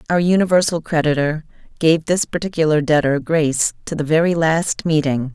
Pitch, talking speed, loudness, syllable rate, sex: 160 Hz, 145 wpm, -17 LUFS, 5.3 syllables/s, female